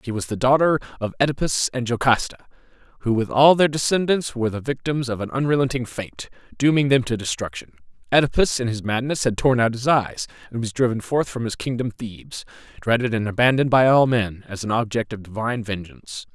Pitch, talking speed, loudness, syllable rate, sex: 120 Hz, 195 wpm, -21 LUFS, 6.0 syllables/s, male